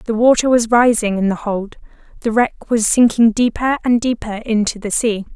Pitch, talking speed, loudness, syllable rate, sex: 225 Hz, 190 wpm, -16 LUFS, 5.0 syllables/s, female